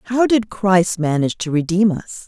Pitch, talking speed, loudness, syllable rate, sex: 190 Hz, 185 wpm, -17 LUFS, 4.8 syllables/s, female